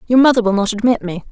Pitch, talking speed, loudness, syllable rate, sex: 220 Hz, 275 wpm, -15 LUFS, 7.3 syllables/s, female